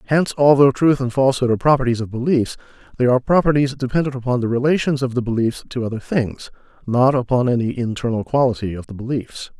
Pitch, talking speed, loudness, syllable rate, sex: 125 Hz, 190 wpm, -18 LUFS, 6.5 syllables/s, male